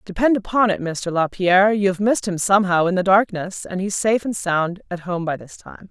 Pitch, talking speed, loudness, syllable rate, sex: 190 Hz, 225 wpm, -19 LUFS, 5.6 syllables/s, female